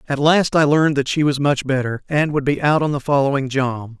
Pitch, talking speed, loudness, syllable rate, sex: 140 Hz, 255 wpm, -18 LUFS, 5.6 syllables/s, male